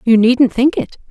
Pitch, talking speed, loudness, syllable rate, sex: 245 Hz, 215 wpm, -13 LUFS, 4.4 syllables/s, female